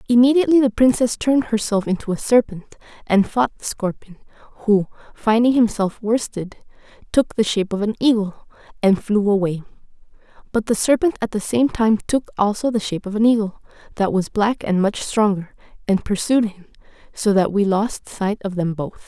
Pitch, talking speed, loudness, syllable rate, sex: 215 Hz, 175 wpm, -19 LUFS, 5.4 syllables/s, female